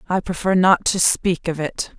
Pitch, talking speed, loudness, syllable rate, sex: 175 Hz, 210 wpm, -18 LUFS, 4.5 syllables/s, female